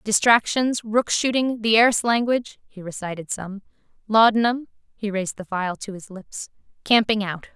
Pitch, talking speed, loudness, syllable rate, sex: 215 Hz, 145 wpm, -21 LUFS, 3.8 syllables/s, female